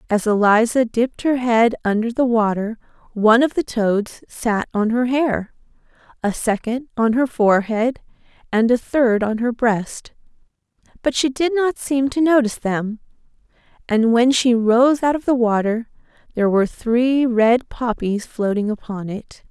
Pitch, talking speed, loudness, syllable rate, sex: 235 Hz, 155 wpm, -18 LUFS, 4.5 syllables/s, female